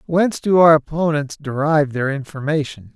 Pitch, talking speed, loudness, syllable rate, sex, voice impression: 150 Hz, 140 wpm, -18 LUFS, 5.4 syllables/s, male, masculine, adult-like, relaxed, slightly weak, soft, raspy, calm, friendly, reassuring, slightly lively, kind, slightly modest